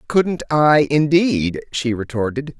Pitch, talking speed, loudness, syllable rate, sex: 140 Hz, 115 wpm, -18 LUFS, 3.7 syllables/s, male